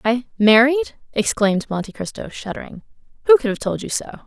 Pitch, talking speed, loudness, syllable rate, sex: 240 Hz, 170 wpm, -19 LUFS, 6.1 syllables/s, female